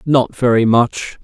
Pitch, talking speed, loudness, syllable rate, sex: 120 Hz, 145 wpm, -14 LUFS, 3.6 syllables/s, male